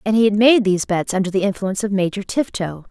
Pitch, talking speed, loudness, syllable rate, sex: 200 Hz, 250 wpm, -18 LUFS, 6.5 syllables/s, female